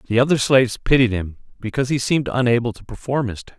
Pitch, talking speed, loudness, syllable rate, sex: 120 Hz, 220 wpm, -19 LUFS, 6.8 syllables/s, male